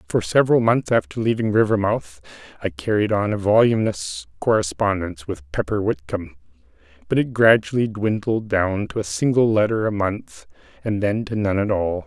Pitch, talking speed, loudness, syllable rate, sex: 110 Hz, 160 wpm, -21 LUFS, 5.2 syllables/s, male